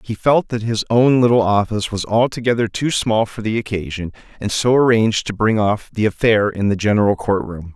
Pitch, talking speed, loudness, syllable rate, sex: 110 Hz, 200 wpm, -17 LUFS, 5.5 syllables/s, male